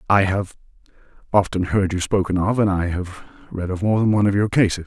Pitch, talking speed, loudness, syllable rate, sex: 95 Hz, 220 wpm, -20 LUFS, 6.0 syllables/s, male